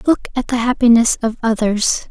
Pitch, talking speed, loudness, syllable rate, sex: 235 Hz, 170 wpm, -16 LUFS, 5.0 syllables/s, female